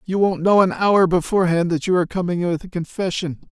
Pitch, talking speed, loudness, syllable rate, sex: 180 Hz, 220 wpm, -19 LUFS, 6.0 syllables/s, male